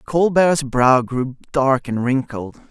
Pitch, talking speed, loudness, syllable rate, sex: 135 Hz, 135 wpm, -18 LUFS, 3.4 syllables/s, male